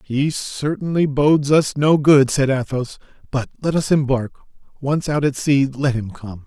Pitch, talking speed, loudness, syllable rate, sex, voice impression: 140 Hz, 175 wpm, -18 LUFS, 4.4 syllables/s, male, masculine, adult-like, slightly refreshing, friendly, kind